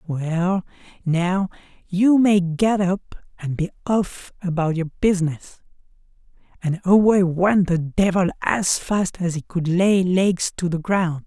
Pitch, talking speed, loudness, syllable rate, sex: 180 Hz, 145 wpm, -20 LUFS, 3.7 syllables/s, male